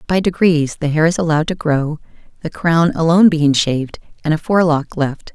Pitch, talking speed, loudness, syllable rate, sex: 160 Hz, 190 wpm, -16 LUFS, 5.6 syllables/s, female